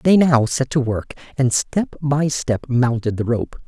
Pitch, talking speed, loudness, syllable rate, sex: 130 Hz, 195 wpm, -19 LUFS, 4.0 syllables/s, male